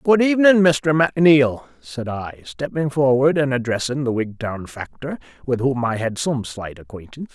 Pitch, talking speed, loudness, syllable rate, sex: 135 Hz, 165 wpm, -19 LUFS, 5.0 syllables/s, male